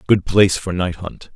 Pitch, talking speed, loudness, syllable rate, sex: 95 Hz, 220 wpm, -17 LUFS, 5.0 syllables/s, male